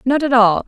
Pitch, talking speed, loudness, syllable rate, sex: 245 Hz, 265 wpm, -14 LUFS, 5.3 syllables/s, female